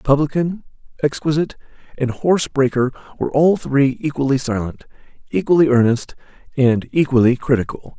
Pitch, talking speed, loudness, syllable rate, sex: 140 Hz, 115 wpm, -18 LUFS, 5.6 syllables/s, male